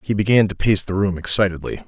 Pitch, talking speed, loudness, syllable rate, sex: 95 Hz, 225 wpm, -18 LUFS, 6.3 syllables/s, male